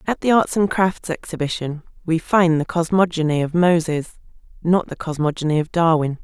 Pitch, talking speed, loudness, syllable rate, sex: 165 Hz, 165 wpm, -19 LUFS, 5.2 syllables/s, female